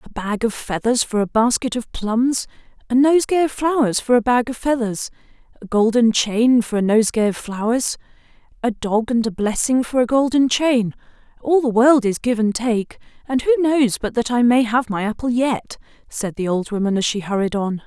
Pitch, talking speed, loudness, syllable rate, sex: 235 Hz, 205 wpm, -19 LUFS, 5.0 syllables/s, female